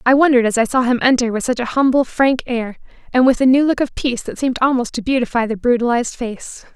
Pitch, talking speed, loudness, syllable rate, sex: 245 Hz, 250 wpm, -16 LUFS, 6.5 syllables/s, female